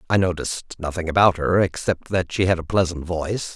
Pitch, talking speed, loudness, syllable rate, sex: 90 Hz, 200 wpm, -22 LUFS, 5.9 syllables/s, male